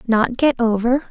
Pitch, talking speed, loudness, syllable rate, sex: 240 Hz, 165 wpm, -18 LUFS, 4.4 syllables/s, female